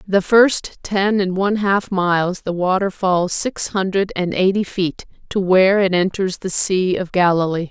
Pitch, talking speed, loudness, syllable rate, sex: 190 Hz, 180 wpm, -18 LUFS, 4.4 syllables/s, female